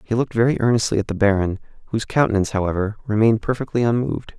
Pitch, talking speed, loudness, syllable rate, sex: 110 Hz, 180 wpm, -20 LUFS, 7.8 syllables/s, male